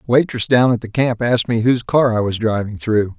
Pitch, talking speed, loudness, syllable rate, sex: 115 Hz, 245 wpm, -17 LUFS, 5.6 syllables/s, male